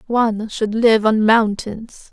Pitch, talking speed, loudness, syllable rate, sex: 220 Hz, 140 wpm, -16 LUFS, 3.6 syllables/s, female